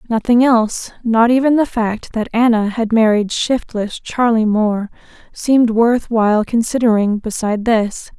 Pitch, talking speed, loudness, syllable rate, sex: 225 Hz, 140 wpm, -15 LUFS, 4.6 syllables/s, female